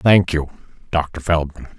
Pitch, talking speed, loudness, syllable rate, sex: 80 Hz, 135 wpm, -20 LUFS, 4.0 syllables/s, male